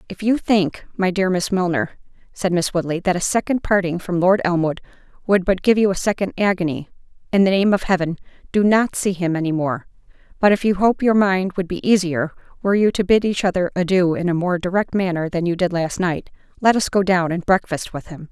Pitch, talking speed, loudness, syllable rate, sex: 185 Hz, 225 wpm, -19 LUFS, 5.6 syllables/s, female